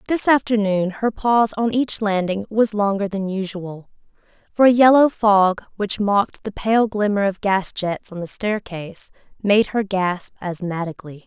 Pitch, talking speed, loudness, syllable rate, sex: 205 Hz, 160 wpm, -19 LUFS, 4.5 syllables/s, female